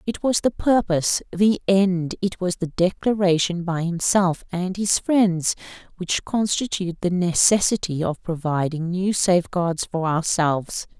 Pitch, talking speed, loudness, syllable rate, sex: 180 Hz, 135 wpm, -21 LUFS, 4.3 syllables/s, female